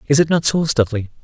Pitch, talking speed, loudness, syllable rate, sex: 135 Hz, 245 wpm, -17 LUFS, 7.1 syllables/s, male